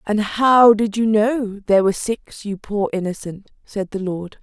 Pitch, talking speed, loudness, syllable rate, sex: 210 Hz, 190 wpm, -18 LUFS, 4.4 syllables/s, female